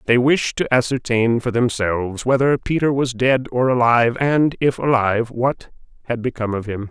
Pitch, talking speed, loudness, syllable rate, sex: 120 Hz, 175 wpm, -18 LUFS, 5.1 syllables/s, male